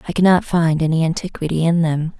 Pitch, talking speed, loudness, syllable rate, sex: 165 Hz, 190 wpm, -17 LUFS, 6.0 syllables/s, female